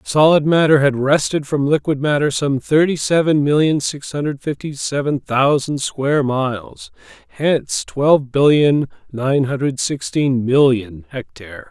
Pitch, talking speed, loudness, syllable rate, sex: 140 Hz, 135 wpm, -17 LUFS, 4.4 syllables/s, male